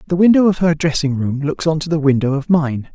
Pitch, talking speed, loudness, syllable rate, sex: 155 Hz, 265 wpm, -16 LUFS, 5.8 syllables/s, male